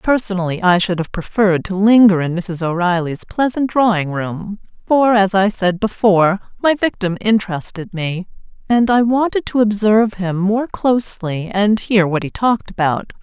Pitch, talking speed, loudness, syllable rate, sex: 200 Hz, 165 wpm, -16 LUFS, 4.9 syllables/s, female